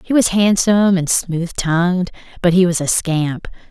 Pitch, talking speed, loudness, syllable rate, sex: 180 Hz, 180 wpm, -16 LUFS, 4.6 syllables/s, female